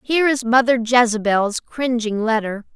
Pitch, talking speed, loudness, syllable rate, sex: 235 Hz, 130 wpm, -18 LUFS, 4.7 syllables/s, female